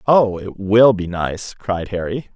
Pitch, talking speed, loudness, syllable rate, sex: 100 Hz, 180 wpm, -18 LUFS, 3.7 syllables/s, male